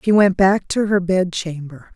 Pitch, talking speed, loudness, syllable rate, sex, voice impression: 185 Hz, 215 wpm, -17 LUFS, 4.3 syllables/s, female, feminine, middle-aged, soft, calm, elegant, kind